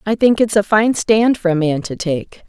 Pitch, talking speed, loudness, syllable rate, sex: 200 Hz, 265 wpm, -16 LUFS, 4.7 syllables/s, female